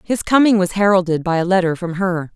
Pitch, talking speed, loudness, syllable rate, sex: 185 Hz, 230 wpm, -16 LUFS, 5.8 syllables/s, female